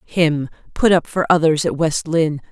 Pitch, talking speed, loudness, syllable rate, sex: 160 Hz, 190 wpm, -17 LUFS, 4.8 syllables/s, female